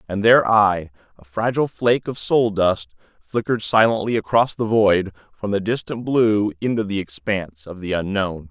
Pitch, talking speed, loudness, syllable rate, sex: 105 Hz, 170 wpm, -20 LUFS, 5.1 syllables/s, male